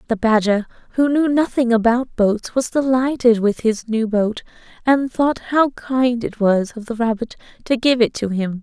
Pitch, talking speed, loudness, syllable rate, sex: 235 Hz, 190 wpm, -18 LUFS, 4.5 syllables/s, female